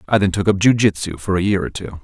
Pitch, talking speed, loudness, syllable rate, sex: 95 Hz, 325 wpm, -18 LUFS, 6.5 syllables/s, male